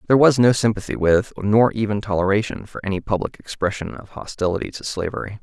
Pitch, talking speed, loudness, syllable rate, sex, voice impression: 105 Hz, 175 wpm, -20 LUFS, 6.2 syllables/s, male, masculine, adult-like, thin, slightly weak, clear, fluent, slightly intellectual, refreshing, slightly friendly, unique, kind, modest, light